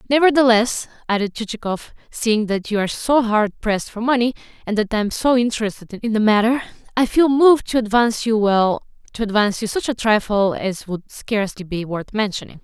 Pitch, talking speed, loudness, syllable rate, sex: 220 Hz, 185 wpm, -19 LUFS, 5.7 syllables/s, female